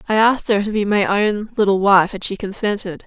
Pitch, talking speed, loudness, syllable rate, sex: 205 Hz, 235 wpm, -17 LUFS, 5.7 syllables/s, female